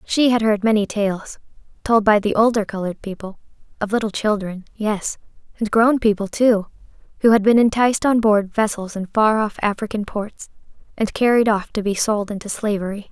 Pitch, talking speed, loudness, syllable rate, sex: 210 Hz, 180 wpm, -19 LUFS, 5.3 syllables/s, female